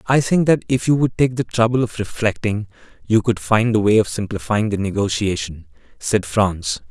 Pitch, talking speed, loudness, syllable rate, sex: 110 Hz, 190 wpm, -19 LUFS, 5.0 syllables/s, male